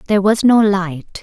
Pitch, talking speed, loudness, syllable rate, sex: 200 Hz, 195 wpm, -14 LUFS, 4.8 syllables/s, female